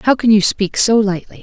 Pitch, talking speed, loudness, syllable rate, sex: 210 Hz, 255 wpm, -14 LUFS, 5.3 syllables/s, female